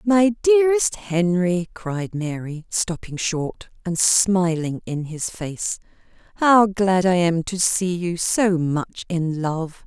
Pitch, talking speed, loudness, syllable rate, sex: 185 Hz, 140 wpm, -21 LUFS, 3.3 syllables/s, female